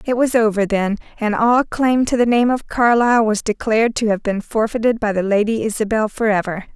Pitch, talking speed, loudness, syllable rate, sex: 220 Hz, 205 wpm, -17 LUFS, 5.6 syllables/s, female